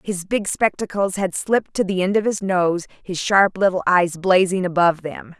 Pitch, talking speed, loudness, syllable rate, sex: 185 Hz, 200 wpm, -19 LUFS, 4.9 syllables/s, female